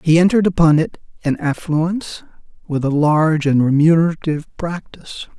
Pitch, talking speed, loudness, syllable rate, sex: 160 Hz, 135 wpm, -17 LUFS, 5.6 syllables/s, male